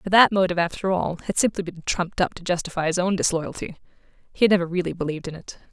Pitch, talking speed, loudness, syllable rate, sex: 175 Hz, 230 wpm, -23 LUFS, 7.2 syllables/s, female